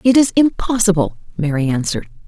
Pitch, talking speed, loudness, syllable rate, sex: 195 Hz, 130 wpm, -17 LUFS, 6.1 syllables/s, female